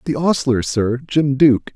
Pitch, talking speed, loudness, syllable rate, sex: 135 Hz, 170 wpm, -17 LUFS, 4.9 syllables/s, male